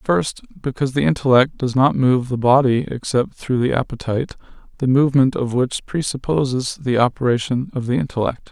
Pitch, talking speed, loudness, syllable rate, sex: 130 Hz, 160 wpm, -19 LUFS, 5.3 syllables/s, male